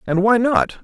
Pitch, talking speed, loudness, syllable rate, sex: 205 Hz, 215 wpm, -16 LUFS, 4.2 syllables/s, male